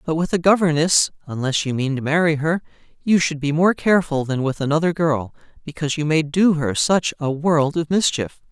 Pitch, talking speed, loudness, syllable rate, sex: 155 Hz, 205 wpm, -19 LUFS, 5.4 syllables/s, male